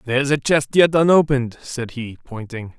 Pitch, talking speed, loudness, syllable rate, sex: 130 Hz, 195 wpm, -18 LUFS, 5.5 syllables/s, male